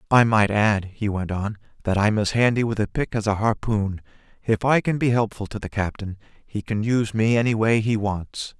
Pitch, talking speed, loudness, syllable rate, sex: 110 Hz, 225 wpm, -22 LUFS, 5.1 syllables/s, male